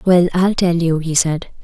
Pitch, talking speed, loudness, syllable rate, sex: 170 Hz, 220 wpm, -16 LUFS, 4.4 syllables/s, female